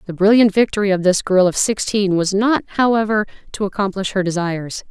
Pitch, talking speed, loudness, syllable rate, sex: 200 Hz, 185 wpm, -17 LUFS, 5.8 syllables/s, female